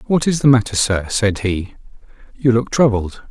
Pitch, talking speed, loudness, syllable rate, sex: 115 Hz, 180 wpm, -17 LUFS, 4.7 syllables/s, male